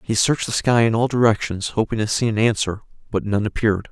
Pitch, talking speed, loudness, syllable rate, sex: 110 Hz, 230 wpm, -20 LUFS, 6.3 syllables/s, male